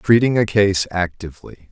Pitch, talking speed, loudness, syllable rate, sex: 100 Hz, 140 wpm, -17 LUFS, 5.1 syllables/s, male